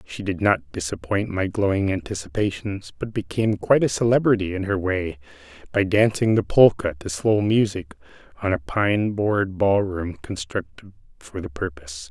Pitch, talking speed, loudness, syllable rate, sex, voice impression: 105 Hz, 155 wpm, -22 LUFS, 4.9 syllables/s, male, very masculine, very adult-like, slightly old, thick, slightly relaxed, powerful, slightly dark, soft, slightly muffled, slightly fluent, slightly raspy, cool, very intellectual, slightly refreshing, very sincere, very calm, very mature, friendly, very reassuring, unique, elegant, wild, sweet, slightly lively, kind, slightly modest